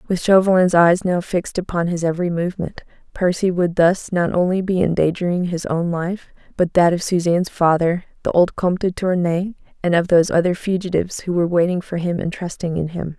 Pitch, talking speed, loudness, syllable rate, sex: 175 Hz, 195 wpm, -19 LUFS, 5.7 syllables/s, female